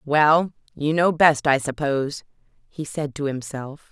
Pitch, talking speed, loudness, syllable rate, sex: 145 Hz, 140 wpm, -21 LUFS, 4.2 syllables/s, female